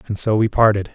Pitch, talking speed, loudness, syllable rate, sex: 105 Hz, 255 wpm, -17 LUFS, 6.3 syllables/s, male